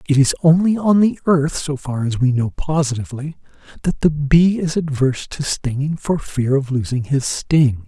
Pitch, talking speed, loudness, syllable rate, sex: 145 Hz, 190 wpm, -18 LUFS, 4.8 syllables/s, male